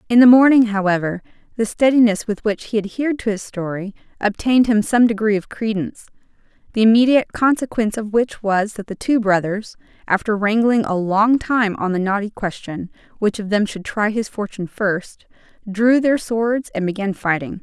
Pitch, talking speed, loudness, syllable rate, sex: 215 Hz, 175 wpm, -18 LUFS, 5.3 syllables/s, female